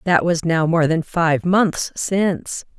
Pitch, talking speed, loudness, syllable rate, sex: 170 Hz, 175 wpm, -18 LUFS, 3.6 syllables/s, female